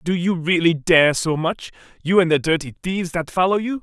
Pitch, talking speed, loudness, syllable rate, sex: 170 Hz, 220 wpm, -19 LUFS, 5.5 syllables/s, male